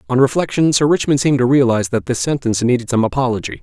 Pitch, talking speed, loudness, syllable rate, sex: 130 Hz, 215 wpm, -16 LUFS, 7.3 syllables/s, male